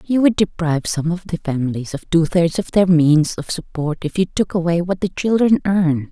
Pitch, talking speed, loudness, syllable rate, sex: 170 Hz, 225 wpm, -18 LUFS, 5.1 syllables/s, female